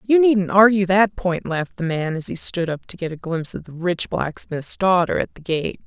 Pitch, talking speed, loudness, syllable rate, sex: 180 Hz, 245 wpm, -20 LUFS, 5.1 syllables/s, female